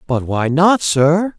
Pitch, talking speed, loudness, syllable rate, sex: 160 Hz, 175 wpm, -15 LUFS, 3.3 syllables/s, male